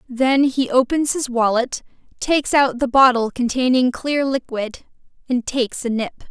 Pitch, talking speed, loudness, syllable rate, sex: 255 Hz, 150 wpm, -19 LUFS, 4.5 syllables/s, female